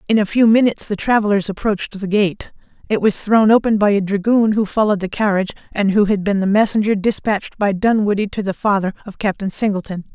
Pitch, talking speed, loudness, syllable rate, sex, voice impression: 205 Hz, 205 wpm, -17 LUFS, 6.2 syllables/s, female, feminine, adult-like, fluent, slightly intellectual, slightly elegant